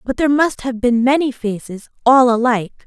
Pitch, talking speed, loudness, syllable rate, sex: 245 Hz, 170 wpm, -16 LUFS, 5.7 syllables/s, female